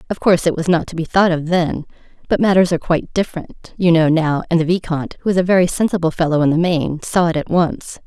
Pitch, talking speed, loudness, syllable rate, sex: 170 Hz, 255 wpm, -17 LUFS, 6.2 syllables/s, female